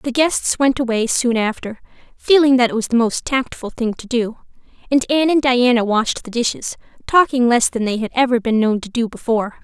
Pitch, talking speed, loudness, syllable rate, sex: 240 Hz, 210 wpm, -17 LUFS, 5.3 syllables/s, female